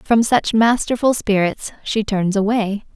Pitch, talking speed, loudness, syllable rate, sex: 215 Hz, 140 wpm, -18 LUFS, 4.0 syllables/s, female